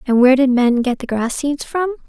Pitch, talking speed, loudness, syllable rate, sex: 265 Hz, 260 wpm, -16 LUFS, 5.4 syllables/s, female